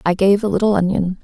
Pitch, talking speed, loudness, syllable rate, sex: 195 Hz, 245 wpm, -16 LUFS, 6.3 syllables/s, female